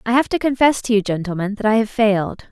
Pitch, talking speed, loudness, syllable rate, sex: 220 Hz, 260 wpm, -18 LUFS, 6.5 syllables/s, female